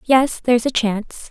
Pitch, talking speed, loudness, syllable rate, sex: 240 Hz, 185 wpm, -18 LUFS, 5.0 syllables/s, female